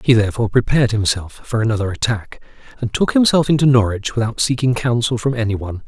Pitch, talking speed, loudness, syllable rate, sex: 115 Hz, 185 wpm, -17 LUFS, 6.5 syllables/s, male